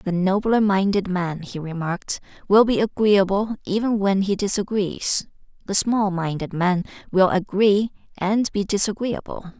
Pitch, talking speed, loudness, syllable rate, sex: 195 Hz, 140 wpm, -21 LUFS, 4.4 syllables/s, female